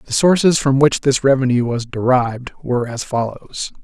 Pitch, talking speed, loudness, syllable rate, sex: 130 Hz, 170 wpm, -17 LUFS, 5.0 syllables/s, male